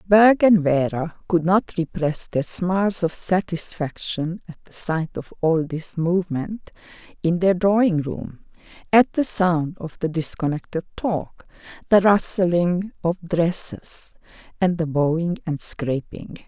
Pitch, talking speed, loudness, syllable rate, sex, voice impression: 170 Hz, 135 wpm, -21 LUFS, 3.8 syllables/s, female, feminine, slightly old, slightly relaxed, soft, slightly halting, friendly, reassuring, elegant, slightly lively, kind, modest